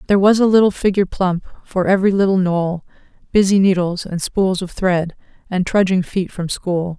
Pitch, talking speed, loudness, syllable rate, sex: 185 Hz, 180 wpm, -17 LUFS, 5.3 syllables/s, female